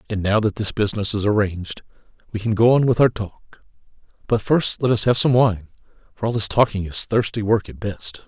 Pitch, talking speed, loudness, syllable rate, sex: 105 Hz, 220 wpm, -19 LUFS, 5.6 syllables/s, male